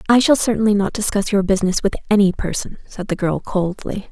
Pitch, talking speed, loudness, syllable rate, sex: 200 Hz, 205 wpm, -18 LUFS, 5.9 syllables/s, female